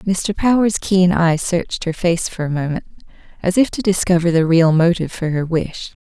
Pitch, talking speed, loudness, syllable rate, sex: 175 Hz, 200 wpm, -17 LUFS, 5.1 syllables/s, female